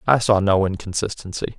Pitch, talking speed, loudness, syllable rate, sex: 100 Hz, 150 wpm, -20 LUFS, 5.6 syllables/s, male